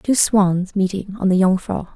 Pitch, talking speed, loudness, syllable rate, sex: 195 Hz, 185 wpm, -18 LUFS, 4.5 syllables/s, female